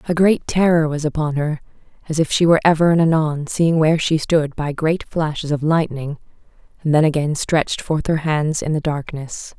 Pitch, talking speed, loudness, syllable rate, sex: 155 Hz, 200 wpm, -18 LUFS, 5.2 syllables/s, female